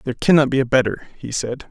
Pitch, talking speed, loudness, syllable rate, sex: 130 Hz, 245 wpm, -18 LUFS, 6.6 syllables/s, male